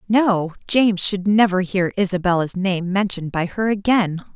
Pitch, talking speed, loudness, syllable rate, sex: 190 Hz, 150 wpm, -19 LUFS, 4.8 syllables/s, female